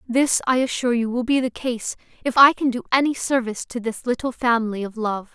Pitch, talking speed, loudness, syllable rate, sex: 240 Hz, 225 wpm, -21 LUFS, 5.9 syllables/s, female